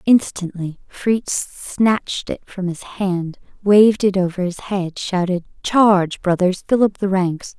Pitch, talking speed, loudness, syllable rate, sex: 190 Hz, 150 wpm, -19 LUFS, 3.9 syllables/s, female